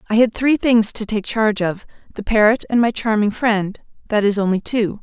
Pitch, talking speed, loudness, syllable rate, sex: 215 Hz, 215 wpm, -17 LUFS, 5.2 syllables/s, female